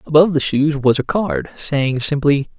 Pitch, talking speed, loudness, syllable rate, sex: 145 Hz, 185 wpm, -17 LUFS, 4.7 syllables/s, male